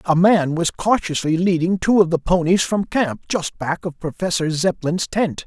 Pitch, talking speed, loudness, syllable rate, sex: 170 Hz, 185 wpm, -19 LUFS, 4.5 syllables/s, male